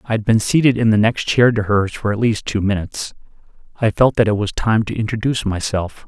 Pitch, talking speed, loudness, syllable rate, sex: 110 Hz, 235 wpm, -17 LUFS, 5.8 syllables/s, male